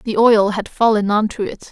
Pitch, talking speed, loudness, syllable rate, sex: 210 Hz, 245 wpm, -16 LUFS, 4.8 syllables/s, female